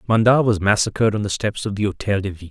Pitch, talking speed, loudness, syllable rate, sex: 105 Hz, 265 wpm, -19 LUFS, 6.9 syllables/s, male